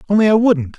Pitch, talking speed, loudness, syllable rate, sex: 195 Hz, 230 wpm, -14 LUFS, 6.8 syllables/s, male